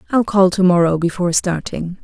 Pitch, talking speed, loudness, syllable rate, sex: 180 Hz, 150 wpm, -16 LUFS, 5.6 syllables/s, female